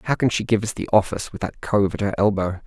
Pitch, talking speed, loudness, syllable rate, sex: 105 Hz, 295 wpm, -22 LUFS, 6.7 syllables/s, male